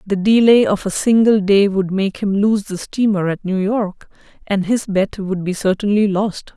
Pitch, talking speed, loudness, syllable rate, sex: 200 Hz, 200 wpm, -17 LUFS, 4.5 syllables/s, female